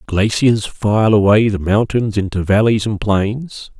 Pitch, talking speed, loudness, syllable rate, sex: 105 Hz, 160 wpm, -15 LUFS, 4.0 syllables/s, male